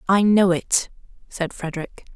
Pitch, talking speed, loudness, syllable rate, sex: 185 Hz, 140 wpm, -20 LUFS, 4.6 syllables/s, female